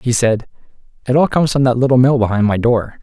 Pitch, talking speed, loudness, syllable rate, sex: 125 Hz, 240 wpm, -14 LUFS, 6.4 syllables/s, male